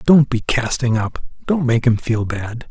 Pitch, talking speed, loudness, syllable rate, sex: 120 Hz, 200 wpm, -18 LUFS, 4.3 syllables/s, male